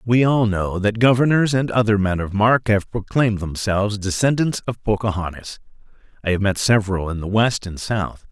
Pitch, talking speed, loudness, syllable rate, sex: 105 Hz, 180 wpm, -19 LUFS, 5.2 syllables/s, male